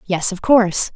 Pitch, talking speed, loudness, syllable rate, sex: 200 Hz, 190 wpm, -16 LUFS, 4.7 syllables/s, female